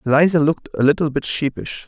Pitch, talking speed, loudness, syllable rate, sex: 150 Hz, 190 wpm, -18 LUFS, 6.7 syllables/s, male